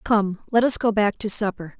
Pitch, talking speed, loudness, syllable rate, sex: 210 Hz, 235 wpm, -21 LUFS, 5.0 syllables/s, female